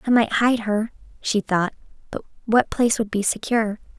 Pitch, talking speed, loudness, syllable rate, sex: 220 Hz, 180 wpm, -22 LUFS, 5.4 syllables/s, female